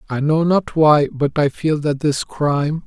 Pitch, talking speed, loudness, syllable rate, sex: 150 Hz, 210 wpm, -17 LUFS, 4.2 syllables/s, male